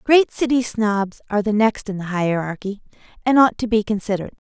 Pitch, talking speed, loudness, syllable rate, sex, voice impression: 215 Hz, 190 wpm, -20 LUFS, 5.6 syllables/s, female, very feminine, young, very thin, tensed, slightly powerful, very bright, very hard, very clear, fluent, very cute, intellectual, very refreshing, slightly sincere, slightly calm, slightly friendly, slightly reassuring, very unique, very elegant, slightly wild, very sweet, very lively, strict, slightly intense, sharp